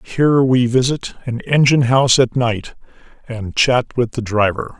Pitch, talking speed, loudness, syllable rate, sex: 125 Hz, 165 wpm, -16 LUFS, 4.8 syllables/s, male